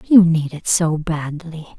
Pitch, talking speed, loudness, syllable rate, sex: 165 Hz, 170 wpm, -18 LUFS, 3.6 syllables/s, female